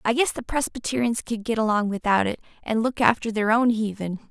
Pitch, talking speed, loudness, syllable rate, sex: 225 Hz, 210 wpm, -23 LUFS, 5.5 syllables/s, female